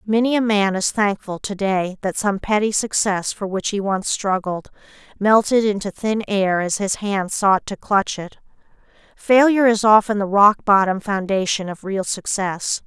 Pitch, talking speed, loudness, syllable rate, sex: 200 Hz, 175 wpm, -19 LUFS, 4.5 syllables/s, female